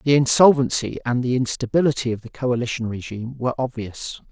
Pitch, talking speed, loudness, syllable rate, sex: 125 Hz, 155 wpm, -21 LUFS, 6.2 syllables/s, male